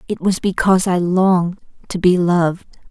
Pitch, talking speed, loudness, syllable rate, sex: 180 Hz, 165 wpm, -16 LUFS, 5.4 syllables/s, female